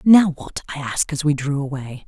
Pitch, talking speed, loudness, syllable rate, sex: 150 Hz, 230 wpm, -21 LUFS, 5.4 syllables/s, female